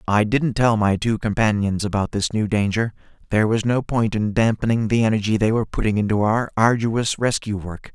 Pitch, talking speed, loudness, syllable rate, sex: 110 Hz, 195 wpm, -20 LUFS, 5.4 syllables/s, male